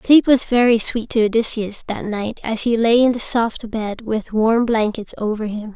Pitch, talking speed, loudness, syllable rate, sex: 225 Hz, 210 wpm, -18 LUFS, 4.4 syllables/s, female